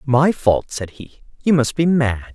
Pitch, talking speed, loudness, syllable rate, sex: 135 Hz, 205 wpm, -18 LUFS, 4.2 syllables/s, male